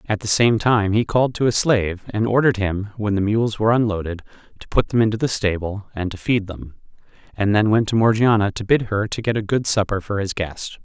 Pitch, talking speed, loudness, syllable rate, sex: 105 Hz, 240 wpm, -20 LUFS, 5.7 syllables/s, male